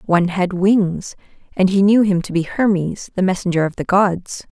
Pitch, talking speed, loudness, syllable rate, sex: 185 Hz, 195 wpm, -17 LUFS, 4.8 syllables/s, female